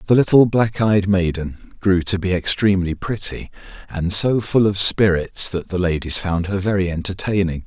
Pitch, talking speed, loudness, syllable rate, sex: 95 Hz, 170 wpm, -18 LUFS, 4.9 syllables/s, male